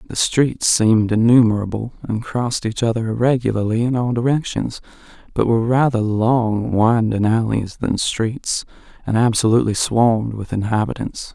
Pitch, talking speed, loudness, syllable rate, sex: 115 Hz, 130 wpm, -18 LUFS, 4.9 syllables/s, male